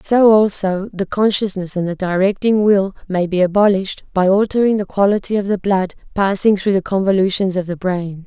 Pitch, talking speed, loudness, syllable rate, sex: 195 Hz, 180 wpm, -16 LUFS, 5.3 syllables/s, female